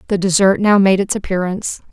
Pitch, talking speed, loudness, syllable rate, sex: 190 Hz, 190 wpm, -15 LUFS, 6.1 syllables/s, female